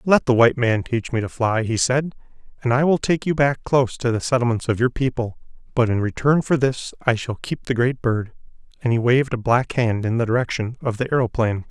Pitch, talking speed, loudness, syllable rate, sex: 125 Hz, 235 wpm, -21 LUFS, 5.8 syllables/s, male